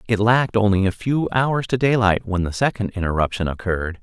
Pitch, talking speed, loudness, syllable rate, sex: 105 Hz, 195 wpm, -20 LUFS, 5.8 syllables/s, male